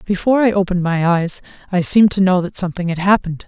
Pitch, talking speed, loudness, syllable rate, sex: 185 Hz, 225 wpm, -16 LUFS, 7.1 syllables/s, female